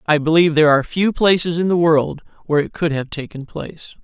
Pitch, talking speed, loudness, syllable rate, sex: 160 Hz, 225 wpm, -17 LUFS, 6.5 syllables/s, male